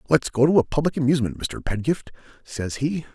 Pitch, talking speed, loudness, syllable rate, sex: 135 Hz, 190 wpm, -23 LUFS, 5.9 syllables/s, male